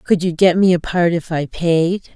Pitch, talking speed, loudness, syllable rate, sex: 175 Hz, 250 wpm, -16 LUFS, 4.6 syllables/s, female